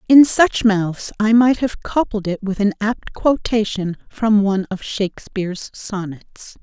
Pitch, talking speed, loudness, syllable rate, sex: 210 Hz, 155 wpm, -18 LUFS, 4.1 syllables/s, female